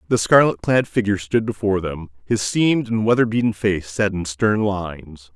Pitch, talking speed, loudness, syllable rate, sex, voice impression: 100 Hz, 190 wpm, -19 LUFS, 5.2 syllables/s, male, very masculine, adult-like, middle-aged, very thick, tensed, powerful, slightly bright, slightly soft, slightly muffled, fluent, very cool, intellectual, very sincere, very calm, friendly, reassuring, very unique, very wild, sweet, lively, very kind, slightly modest